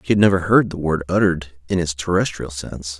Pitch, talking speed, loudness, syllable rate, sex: 85 Hz, 220 wpm, -19 LUFS, 6.3 syllables/s, male